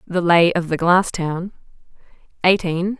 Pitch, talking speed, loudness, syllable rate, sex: 175 Hz, 140 wpm, -18 LUFS, 4.1 syllables/s, female